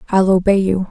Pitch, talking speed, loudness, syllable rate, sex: 190 Hz, 200 wpm, -15 LUFS, 5.6 syllables/s, female